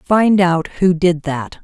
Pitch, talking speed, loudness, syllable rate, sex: 175 Hz, 185 wpm, -15 LUFS, 3.2 syllables/s, female